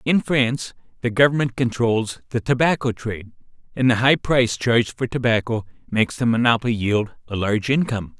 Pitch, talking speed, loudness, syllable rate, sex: 120 Hz, 160 wpm, -20 LUFS, 5.8 syllables/s, male